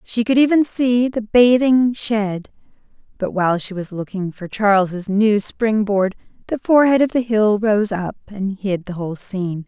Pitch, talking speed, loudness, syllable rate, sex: 210 Hz, 175 wpm, -18 LUFS, 4.5 syllables/s, female